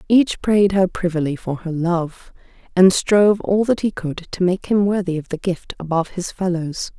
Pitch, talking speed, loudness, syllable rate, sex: 180 Hz, 200 wpm, -19 LUFS, 4.8 syllables/s, female